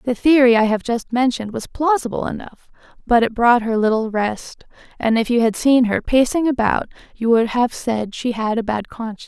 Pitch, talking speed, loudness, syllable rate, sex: 235 Hz, 205 wpm, -18 LUFS, 5.3 syllables/s, female